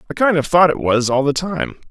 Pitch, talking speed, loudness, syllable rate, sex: 155 Hz, 285 wpm, -16 LUFS, 5.7 syllables/s, male